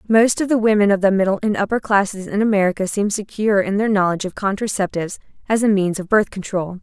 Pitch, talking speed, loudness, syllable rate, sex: 200 Hz, 220 wpm, -18 LUFS, 6.5 syllables/s, female